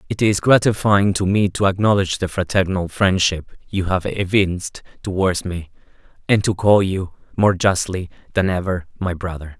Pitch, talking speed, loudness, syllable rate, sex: 95 Hz, 155 wpm, -19 LUFS, 4.9 syllables/s, male